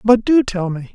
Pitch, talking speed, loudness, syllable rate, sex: 210 Hz, 255 wpm, -16 LUFS, 4.7 syllables/s, male